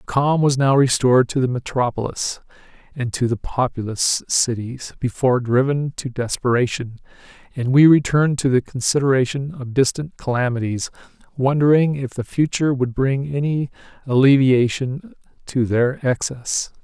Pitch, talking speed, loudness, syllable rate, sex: 130 Hz, 130 wpm, -19 LUFS, 4.8 syllables/s, male